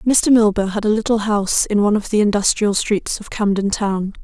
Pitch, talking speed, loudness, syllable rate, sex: 210 Hz, 215 wpm, -17 LUFS, 5.3 syllables/s, female